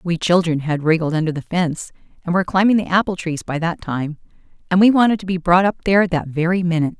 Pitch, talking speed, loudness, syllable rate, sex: 175 Hz, 230 wpm, -18 LUFS, 6.5 syllables/s, female